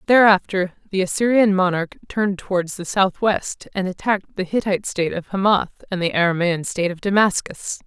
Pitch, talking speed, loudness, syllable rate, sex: 190 Hz, 160 wpm, -20 LUFS, 5.5 syllables/s, female